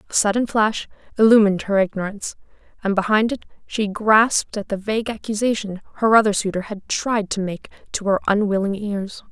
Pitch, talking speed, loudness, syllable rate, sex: 210 Hz, 165 wpm, -20 LUFS, 5.6 syllables/s, female